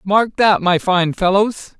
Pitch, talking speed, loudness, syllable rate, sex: 195 Hz, 165 wpm, -15 LUFS, 3.6 syllables/s, male